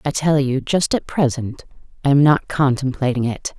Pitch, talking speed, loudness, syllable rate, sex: 135 Hz, 185 wpm, -18 LUFS, 4.9 syllables/s, female